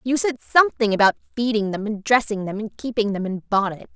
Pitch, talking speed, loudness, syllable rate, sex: 220 Hz, 210 wpm, -21 LUFS, 6.2 syllables/s, female